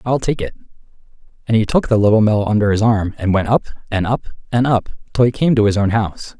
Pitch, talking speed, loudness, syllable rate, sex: 110 Hz, 245 wpm, -17 LUFS, 6.5 syllables/s, male